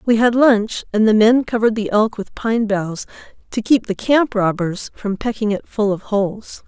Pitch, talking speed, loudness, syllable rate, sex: 215 Hz, 205 wpm, -17 LUFS, 4.7 syllables/s, female